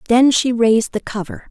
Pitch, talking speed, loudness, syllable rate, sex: 235 Hz, 200 wpm, -16 LUFS, 5.4 syllables/s, female